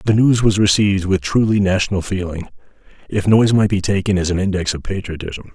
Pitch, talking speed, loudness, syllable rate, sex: 100 Hz, 195 wpm, -17 LUFS, 6.2 syllables/s, male